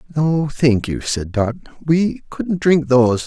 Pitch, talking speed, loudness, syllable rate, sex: 150 Hz, 165 wpm, -18 LUFS, 3.8 syllables/s, male